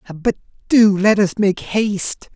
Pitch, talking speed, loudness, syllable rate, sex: 200 Hz, 155 wpm, -17 LUFS, 4.0 syllables/s, male